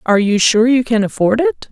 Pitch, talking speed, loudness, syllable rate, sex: 235 Hz, 245 wpm, -14 LUFS, 5.7 syllables/s, female